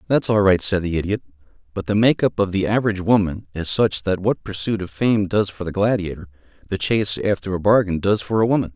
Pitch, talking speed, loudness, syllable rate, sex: 100 Hz, 225 wpm, -20 LUFS, 6.1 syllables/s, male